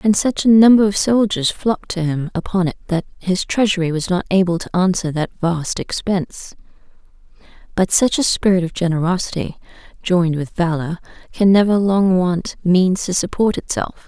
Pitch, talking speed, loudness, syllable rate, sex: 185 Hz, 165 wpm, -17 LUFS, 5.1 syllables/s, female